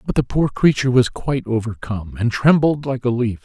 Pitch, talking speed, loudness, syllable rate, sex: 125 Hz, 210 wpm, -18 LUFS, 5.9 syllables/s, male